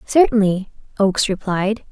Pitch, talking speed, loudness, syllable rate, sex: 200 Hz, 95 wpm, -18 LUFS, 4.7 syllables/s, female